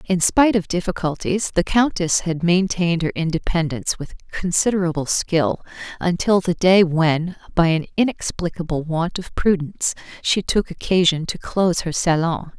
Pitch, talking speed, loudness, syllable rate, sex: 175 Hz, 145 wpm, -20 LUFS, 4.9 syllables/s, female